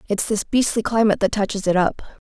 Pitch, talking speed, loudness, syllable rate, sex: 210 Hz, 210 wpm, -20 LUFS, 6.4 syllables/s, female